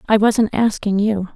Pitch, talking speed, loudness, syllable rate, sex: 210 Hz, 175 wpm, -17 LUFS, 4.4 syllables/s, female